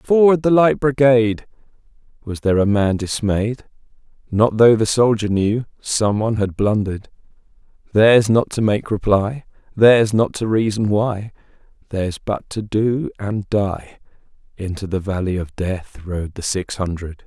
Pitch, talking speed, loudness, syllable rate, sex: 105 Hz, 145 wpm, -18 LUFS, 4.3 syllables/s, male